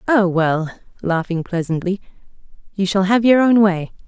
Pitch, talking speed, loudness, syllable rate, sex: 190 Hz, 145 wpm, -18 LUFS, 4.7 syllables/s, female